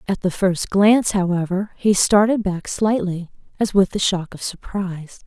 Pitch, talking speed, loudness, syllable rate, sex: 190 Hz, 170 wpm, -19 LUFS, 4.6 syllables/s, female